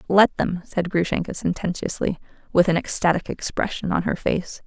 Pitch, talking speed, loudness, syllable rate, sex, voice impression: 180 Hz, 155 wpm, -23 LUFS, 5.1 syllables/s, female, feminine, adult-like, calm, slightly elegant